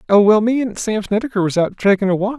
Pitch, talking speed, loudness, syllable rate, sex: 210 Hz, 275 wpm, -16 LUFS, 6.3 syllables/s, male